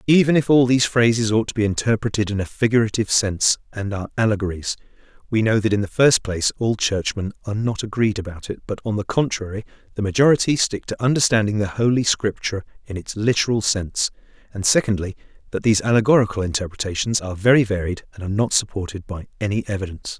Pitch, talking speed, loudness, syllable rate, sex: 105 Hz, 185 wpm, -20 LUFS, 6.7 syllables/s, male